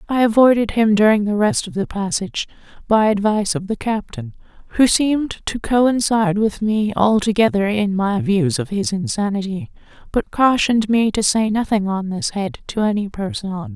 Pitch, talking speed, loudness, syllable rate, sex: 210 Hz, 180 wpm, -18 LUFS, 5.1 syllables/s, female